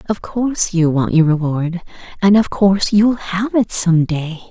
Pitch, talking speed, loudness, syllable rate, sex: 185 Hz, 185 wpm, -16 LUFS, 4.4 syllables/s, female